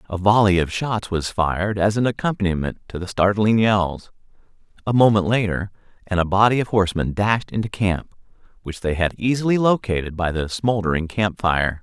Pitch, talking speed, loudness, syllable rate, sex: 100 Hz, 170 wpm, -20 LUFS, 5.3 syllables/s, male